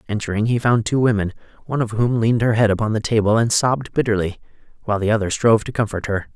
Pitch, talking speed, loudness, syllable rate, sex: 110 Hz, 225 wpm, -19 LUFS, 7.1 syllables/s, male